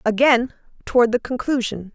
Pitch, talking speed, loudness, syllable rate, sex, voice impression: 235 Hz, 125 wpm, -19 LUFS, 5.2 syllables/s, female, feminine, slightly adult-like, slightly soft, slightly cute, friendly, kind